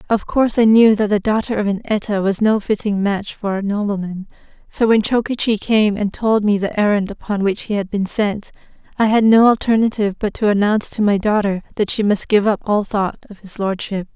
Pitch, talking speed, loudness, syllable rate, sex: 210 Hz, 220 wpm, -17 LUFS, 5.5 syllables/s, female